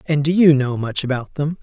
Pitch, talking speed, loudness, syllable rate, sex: 145 Hz, 260 wpm, -18 LUFS, 5.3 syllables/s, male